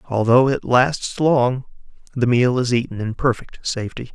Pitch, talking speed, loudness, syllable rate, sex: 125 Hz, 160 wpm, -19 LUFS, 4.6 syllables/s, male